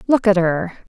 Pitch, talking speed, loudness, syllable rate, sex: 190 Hz, 205 wpm, -17 LUFS, 5.1 syllables/s, female